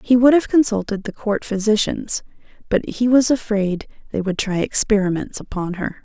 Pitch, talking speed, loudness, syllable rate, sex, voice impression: 215 Hz, 170 wpm, -19 LUFS, 5.0 syllables/s, female, very feminine, very adult-like, slightly middle-aged, thin, slightly tensed, slightly weak, slightly bright, slightly hard, slightly clear, fluent, slightly raspy, very cute, intellectual, very refreshing, sincere, calm, very friendly, very reassuring, very unique, very elegant, slightly wild, very sweet, slightly lively, very kind, slightly intense, modest, light